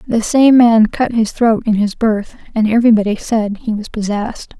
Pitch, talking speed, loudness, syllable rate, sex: 220 Hz, 195 wpm, -14 LUFS, 5.0 syllables/s, female